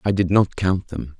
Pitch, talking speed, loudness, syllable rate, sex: 90 Hz, 250 wpm, -20 LUFS, 4.6 syllables/s, male